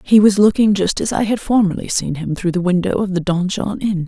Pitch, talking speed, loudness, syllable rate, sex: 195 Hz, 250 wpm, -17 LUFS, 5.5 syllables/s, female